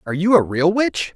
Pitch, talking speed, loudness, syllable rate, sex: 180 Hz, 260 wpm, -17 LUFS, 5.8 syllables/s, male